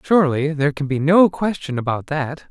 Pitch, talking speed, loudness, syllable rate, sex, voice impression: 150 Hz, 190 wpm, -19 LUFS, 5.6 syllables/s, male, masculine, adult-like, refreshing, friendly, slightly unique